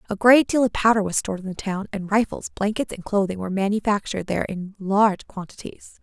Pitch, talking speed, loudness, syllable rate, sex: 205 Hz, 210 wpm, -22 LUFS, 6.2 syllables/s, female